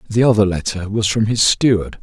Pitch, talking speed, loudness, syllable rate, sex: 105 Hz, 210 wpm, -16 LUFS, 5.4 syllables/s, male